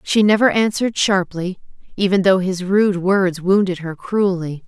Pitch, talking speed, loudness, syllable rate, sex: 190 Hz, 155 wpm, -17 LUFS, 4.5 syllables/s, female